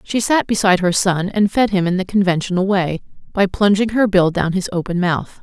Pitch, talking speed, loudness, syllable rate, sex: 190 Hz, 220 wpm, -17 LUFS, 5.4 syllables/s, female